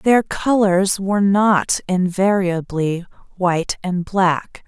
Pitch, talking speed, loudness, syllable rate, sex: 190 Hz, 105 wpm, -18 LUFS, 3.3 syllables/s, female